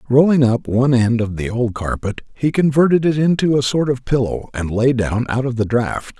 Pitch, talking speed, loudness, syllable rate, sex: 125 Hz, 225 wpm, -17 LUFS, 5.1 syllables/s, male